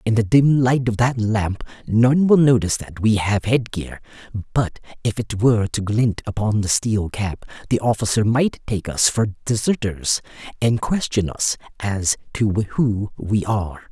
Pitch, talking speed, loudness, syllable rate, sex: 110 Hz, 175 wpm, -20 LUFS, 4.3 syllables/s, male